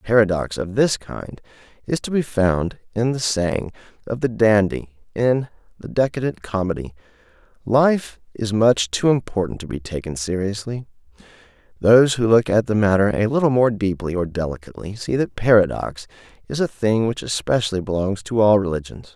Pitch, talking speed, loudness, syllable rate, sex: 105 Hz, 160 wpm, -20 LUFS, 5.1 syllables/s, male